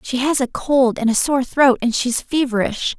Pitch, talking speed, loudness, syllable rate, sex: 255 Hz, 220 wpm, -18 LUFS, 4.6 syllables/s, female